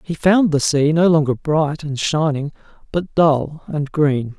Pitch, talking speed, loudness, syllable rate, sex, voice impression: 155 Hz, 180 wpm, -18 LUFS, 3.9 syllables/s, male, very masculine, very adult-like, slightly middle-aged, slightly thick, very relaxed, weak, dark, very soft, slightly clear, fluent, very cool, very intellectual, very refreshing, very sincere, very calm, very friendly, very reassuring, unique, very elegant, very sweet, very kind, very modest